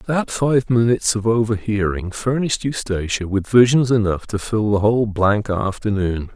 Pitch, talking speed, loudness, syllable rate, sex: 110 Hz, 150 wpm, -19 LUFS, 4.8 syllables/s, male